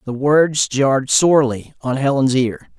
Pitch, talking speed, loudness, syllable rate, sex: 135 Hz, 150 wpm, -16 LUFS, 4.4 syllables/s, male